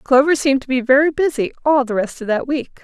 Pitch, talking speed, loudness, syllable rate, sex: 270 Hz, 255 wpm, -17 LUFS, 6.0 syllables/s, female